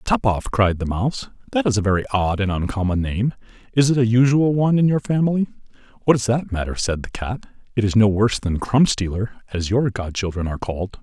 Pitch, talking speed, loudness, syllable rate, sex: 115 Hz, 220 wpm, -20 LUFS, 6.0 syllables/s, male